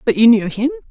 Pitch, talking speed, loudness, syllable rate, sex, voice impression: 235 Hz, 265 wpm, -14 LUFS, 6.7 syllables/s, female, feminine, adult-like, slightly thin, slightly relaxed, slightly weak, intellectual, slightly calm, slightly kind, slightly modest